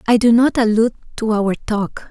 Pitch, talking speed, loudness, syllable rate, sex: 225 Hz, 200 wpm, -17 LUFS, 5.2 syllables/s, female